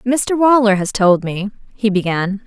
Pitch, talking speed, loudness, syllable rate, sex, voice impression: 215 Hz, 170 wpm, -15 LUFS, 4.1 syllables/s, female, feminine, adult-like, clear, very fluent, slightly sincere, friendly, slightly reassuring, slightly elegant